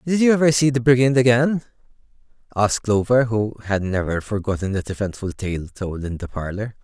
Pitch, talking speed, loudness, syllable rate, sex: 115 Hz, 175 wpm, -20 LUFS, 5.5 syllables/s, male